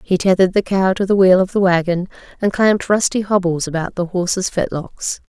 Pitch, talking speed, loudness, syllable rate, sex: 185 Hz, 205 wpm, -17 LUFS, 5.6 syllables/s, female